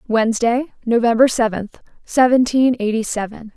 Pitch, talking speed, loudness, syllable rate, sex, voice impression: 235 Hz, 100 wpm, -17 LUFS, 5.0 syllables/s, female, very feminine, slightly young, slightly adult-like, very thin, slightly tensed, slightly weak, slightly dark, slightly hard, clear, fluent, slightly raspy, very cute, intellectual, slightly refreshing, sincere, slightly calm, very friendly, very reassuring, unique, elegant, very sweet, lively, kind, slightly modest